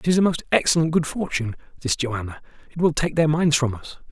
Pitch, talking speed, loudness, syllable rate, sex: 145 Hz, 220 wpm, -22 LUFS, 6.0 syllables/s, male